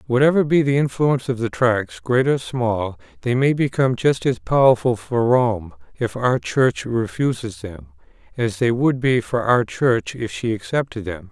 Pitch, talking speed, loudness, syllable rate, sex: 125 Hz, 180 wpm, -20 LUFS, 4.5 syllables/s, male